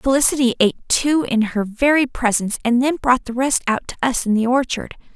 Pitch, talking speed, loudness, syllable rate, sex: 250 Hz, 210 wpm, -18 LUFS, 5.6 syllables/s, female